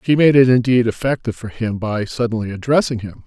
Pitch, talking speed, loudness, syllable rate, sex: 120 Hz, 200 wpm, -17 LUFS, 6.0 syllables/s, male